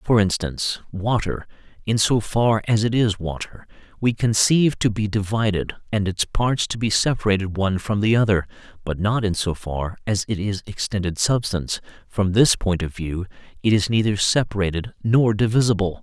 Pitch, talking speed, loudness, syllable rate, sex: 105 Hz, 170 wpm, -21 LUFS, 5.1 syllables/s, male